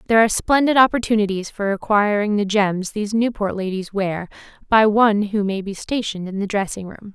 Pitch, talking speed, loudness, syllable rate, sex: 205 Hz, 185 wpm, -19 LUFS, 5.8 syllables/s, female